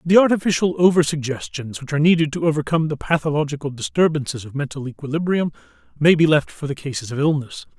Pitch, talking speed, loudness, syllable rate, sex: 150 Hz, 175 wpm, -20 LUFS, 6.6 syllables/s, male